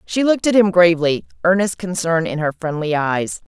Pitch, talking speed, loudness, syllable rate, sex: 175 Hz, 185 wpm, -17 LUFS, 5.5 syllables/s, female